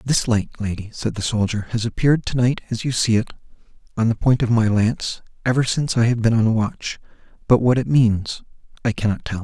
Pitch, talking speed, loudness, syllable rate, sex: 115 Hz, 215 wpm, -20 LUFS, 5.7 syllables/s, male